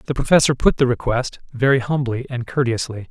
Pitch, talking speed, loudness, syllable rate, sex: 125 Hz, 175 wpm, -19 LUFS, 5.5 syllables/s, male